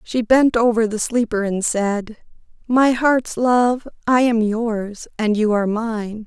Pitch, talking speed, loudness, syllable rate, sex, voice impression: 225 Hz, 165 wpm, -18 LUFS, 3.6 syllables/s, female, feminine, very adult-like, slightly intellectual, sincere, slightly elegant